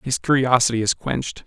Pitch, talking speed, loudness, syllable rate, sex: 125 Hz, 165 wpm, -20 LUFS, 5.8 syllables/s, male